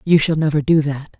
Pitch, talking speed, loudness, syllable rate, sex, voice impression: 150 Hz, 250 wpm, -17 LUFS, 5.5 syllables/s, female, feminine, middle-aged, tensed, powerful, hard, clear, fluent, intellectual, elegant, lively, slightly strict, sharp